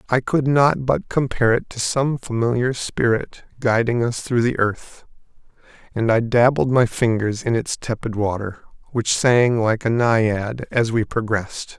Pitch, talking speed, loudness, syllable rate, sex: 115 Hz, 165 wpm, -20 LUFS, 4.3 syllables/s, male